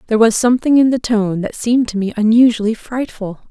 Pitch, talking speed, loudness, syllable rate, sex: 225 Hz, 205 wpm, -15 LUFS, 6.2 syllables/s, female